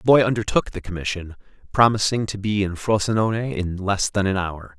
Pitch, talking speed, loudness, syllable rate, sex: 100 Hz, 190 wpm, -22 LUFS, 5.6 syllables/s, male